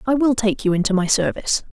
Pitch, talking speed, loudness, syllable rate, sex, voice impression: 220 Hz, 240 wpm, -19 LUFS, 6.6 syllables/s, female, feminine, slightly young, relaxed, slightly bright, soft, slightly raspy, cute, slightly refreshing, friendly, reassuring, elegant, kind, modest